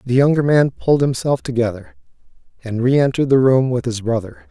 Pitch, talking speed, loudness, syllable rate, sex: 130 Hz, 175 wpm, -17 LUFS, 5.9 syllables/s, male